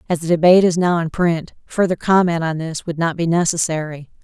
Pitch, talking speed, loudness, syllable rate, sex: 170 Hz, 215 wpm, -17 LUFS, 5.7 syllables/s, female